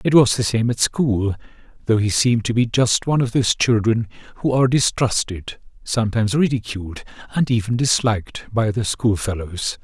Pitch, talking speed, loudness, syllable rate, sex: 115 Hz, 165 wpm, -19 LUFS, 5.4 syllables/s, male